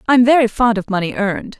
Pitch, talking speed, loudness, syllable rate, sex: 225 Hz, 225 wpm, -15 LUFS, 6.3 syllables/s, female